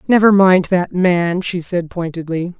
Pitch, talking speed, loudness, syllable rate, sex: 180 Hz, 160 wpm, -15 LUFS, 4.1 syllables/s, female